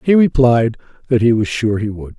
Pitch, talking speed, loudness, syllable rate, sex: 120 Hz, 220 wpm, -15 LUFS, 5.1 syllables/s, male